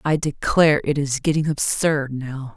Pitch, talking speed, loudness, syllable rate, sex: 145 Hz, 165 wpm, -20 LUFS, 4.6 syllables/s, female